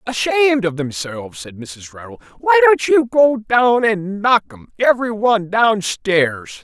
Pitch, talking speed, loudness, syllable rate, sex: 205 Hz, 155 wpm, -16 LUFS, 4.2 syllables/s, male